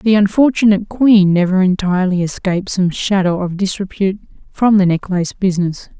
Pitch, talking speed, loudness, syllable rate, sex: 190 Hz, 140 wpm, -15 LUFS, 5.8 syllables/s, female